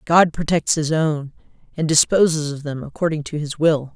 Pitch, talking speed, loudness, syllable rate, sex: 155 Hz, 180 wpm, -19 LUFS, 5.0 syllables/s, female